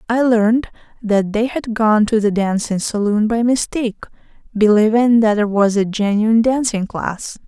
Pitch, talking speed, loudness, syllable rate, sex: 220 Hz, 160 wpm, -16 LUFS, 4.6 syllables/s, female